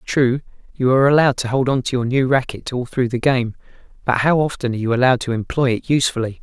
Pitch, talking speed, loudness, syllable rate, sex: 125 Hz, 235 wpm, -18 LUFS, 6.7 syllables/s, male